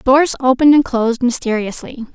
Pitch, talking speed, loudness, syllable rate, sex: 255 Hz, 140 wpm, -14 LUFS, 5.7 syllables/s, female